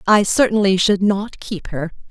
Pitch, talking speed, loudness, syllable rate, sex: 200 Hz, 170 wpm, -17 LUFS, 4.4 syllables/s, female